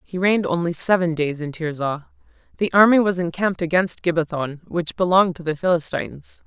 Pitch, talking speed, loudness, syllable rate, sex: 170 Hz, 165 wpm, -20 LUFS, 5.7 syllables/s, female